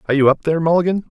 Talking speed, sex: 260 wpm, male